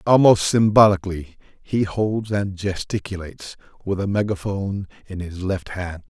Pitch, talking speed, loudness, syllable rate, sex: 100 Hz, 125 wpm, -21 LUFS, 4.8 syllables/s, male